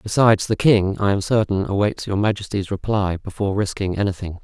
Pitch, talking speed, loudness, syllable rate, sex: 100 Hz, 175 wpm, -20 LUFS, 5.7 syllables/s, male